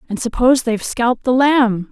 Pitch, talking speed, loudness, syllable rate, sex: 240 Hz, 190 wpm, -16 LUFS, 5.2 syllables/s, female